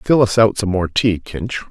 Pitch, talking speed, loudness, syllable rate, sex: 100 Hz, 245 wpm, -17 LUFS, 4.5 syllables/s, male